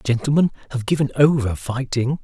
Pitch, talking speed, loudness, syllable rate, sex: 130 Hz, 135 wpm, -20 LUFS, 5.4 syllables/s, male